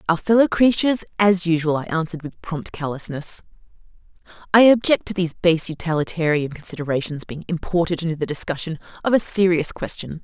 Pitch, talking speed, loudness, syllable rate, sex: 170 Hz, 150 wpm, -20 LUFS, 6.0 syllables/s, female